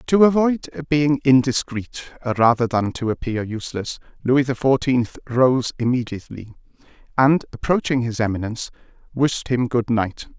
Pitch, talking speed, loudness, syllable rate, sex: 125 Hz, 125 wpm, -20 LUFS, 4.7 syllables/s, male